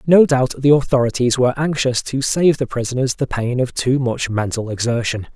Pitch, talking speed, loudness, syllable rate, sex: 130 Hz, 190 wpm, -18 LUFS, 5.3 syllables/s, male